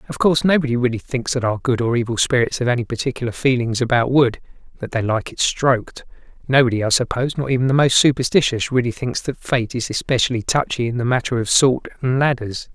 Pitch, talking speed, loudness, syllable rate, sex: 125 Hz, 205 wpm, -19 LUFS, 6.2 syllables/s, male